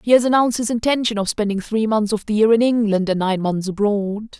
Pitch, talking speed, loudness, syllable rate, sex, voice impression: 215 Hz, 245 wpm, -19 LUFS, 5.9 syllables/s, female, feminine, adult-like, tensed, powerful, clear, fluent, intellectual, friendly, slightly unique, lively, slightly sharp